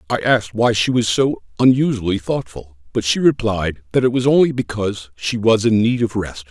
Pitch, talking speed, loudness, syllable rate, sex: 110 Hz, 205 wpm, -18 LUFS, 5.3 syllables/s, male